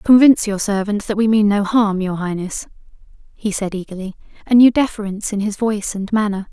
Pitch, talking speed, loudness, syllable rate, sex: 205 Hz, 195 wpm, -17 LUFS, 5.8 syllables/s, female